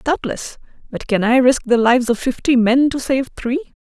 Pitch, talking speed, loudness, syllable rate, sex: 255 Hz, 205 wpm, -16 LUFS, 5.1 syllables/s, female